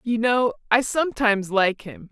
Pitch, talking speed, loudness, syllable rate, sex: 230 Hz, 170 wpm, -21 LUFS, 4.9 syllables/s, female